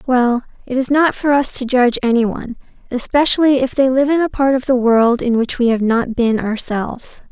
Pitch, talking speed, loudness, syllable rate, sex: 255 Hz, 215 wpm, -16 LUFS, 5.4 syllables/s, female